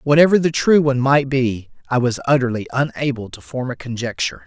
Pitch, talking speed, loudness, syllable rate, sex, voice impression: 135 Hz, 190 wpm, -18 LUFS, 6.0 syllables/s, male, masculine, very adult-like, slightly intellectual, slightly refreshing